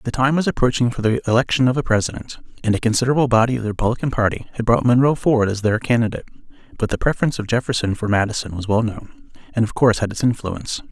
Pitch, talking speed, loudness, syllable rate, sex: 115 Hz, 225 wpm, -19 LUFS, 7.4 syllables/s, male